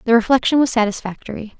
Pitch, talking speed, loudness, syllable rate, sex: 230 Hz, 150 wpm, -17 LUFS, 7.0 syllables/s, female